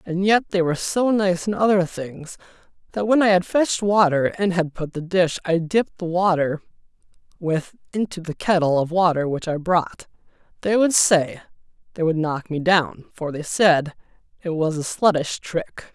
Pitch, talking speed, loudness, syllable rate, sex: 175 Hz, 185 wpm, -21 LUFS, 4.7 syllables/s, male